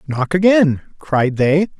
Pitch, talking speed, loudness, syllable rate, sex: 160 Hz, 135 wpm, -15 LUFS, 3.5 syllables/s, male